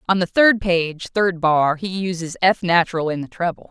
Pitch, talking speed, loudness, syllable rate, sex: 175 Hz, 210 wpm, -19 LUFS, 4.9 syllables/s, female